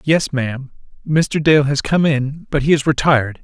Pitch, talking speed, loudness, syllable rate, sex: 140 Hz, 190 wpm, -16 LUFS, 4.7 syllables/s, male